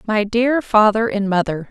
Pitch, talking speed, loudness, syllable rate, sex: 215 Hz, 175 wpm, -17 LUFS, 4.4 syllables/s, female